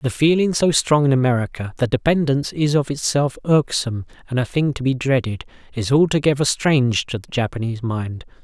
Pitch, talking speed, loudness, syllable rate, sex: 135 Hz, 180 wpm, -19 LUFS, 5.7 syllables/s, male